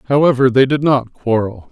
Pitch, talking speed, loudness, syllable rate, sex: 130 Hz, 175 wpm, -14 LUFS, 4.8 syllables/s, male